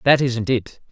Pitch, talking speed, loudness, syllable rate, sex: 125 Hz, 195 wpm, -20 LUFS, 4.1 syllables/s, male